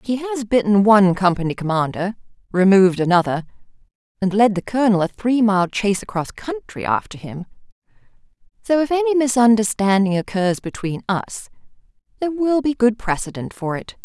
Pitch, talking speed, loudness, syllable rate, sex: 210 Hz, 145 wpm, -19 LUFS, 5.5 syllables/s, female